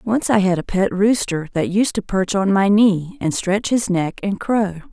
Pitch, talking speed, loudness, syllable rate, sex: 195 Hz, 230 wpm, -18 LUFS, 4.3 syllables/s, female